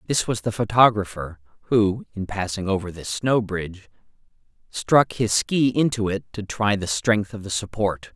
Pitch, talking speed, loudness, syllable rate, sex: 105 Hz, 170 wpm, -22 LUFS, 4.6 syllables/s, male